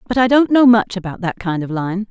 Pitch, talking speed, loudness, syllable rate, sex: 205 Hz, 285 wpm, -16 LUFS, 5.7 syllables/s, female